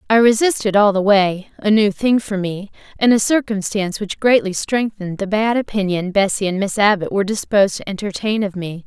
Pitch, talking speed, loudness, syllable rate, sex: 205 Hz, 195 wpm, -17 LUFS, 5.5 syllables/s, female